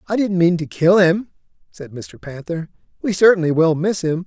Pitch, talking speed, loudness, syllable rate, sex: 170 Hz, 195 wpm, -17 LUFS, 4.9 syllables/s, male